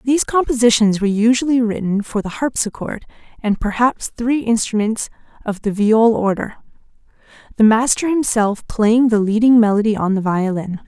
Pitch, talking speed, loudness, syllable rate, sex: 225 Hz, 145 wpm, -17 LUFS, 5.1 syllables/s, female